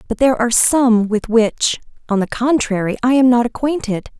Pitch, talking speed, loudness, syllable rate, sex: 235 Hz, 185 wpm, -16 LUFS, 5.2 syllables/s, female